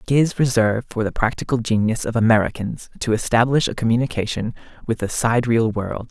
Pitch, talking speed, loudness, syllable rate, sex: 115 Hz, 165 wpm, -20 LUFS, 5.9 syllables/s, male